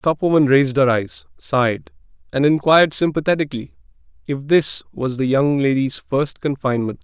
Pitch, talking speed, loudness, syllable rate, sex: 140 Hz, 145 wpm, -18 LUFS, 5.5 syllables/s, male